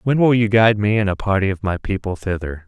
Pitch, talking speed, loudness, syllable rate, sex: 100 Hz, 270 wpm, -18 LUFS, 6.2 syllables/s, male